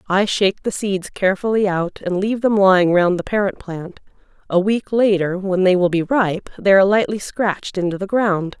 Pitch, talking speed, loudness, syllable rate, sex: 195 Hz, 200 wpm, -18 LUFS, 5.3 syllables/s, female